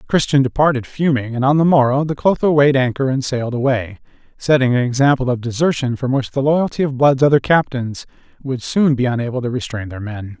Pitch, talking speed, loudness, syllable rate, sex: 130 Hz, 200 wpm, -17 LUFS, 5.9 syllables/s, male